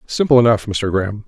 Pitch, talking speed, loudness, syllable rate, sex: 110 Hz, 190 wpm, -16 LUFS, 6.1 syllables/s, male